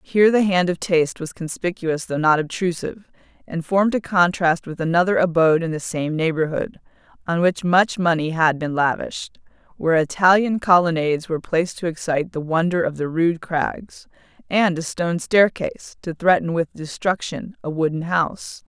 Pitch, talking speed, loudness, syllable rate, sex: 170 Hz, 165 wpm, -20 LUFS, 5.3 syllables/s, female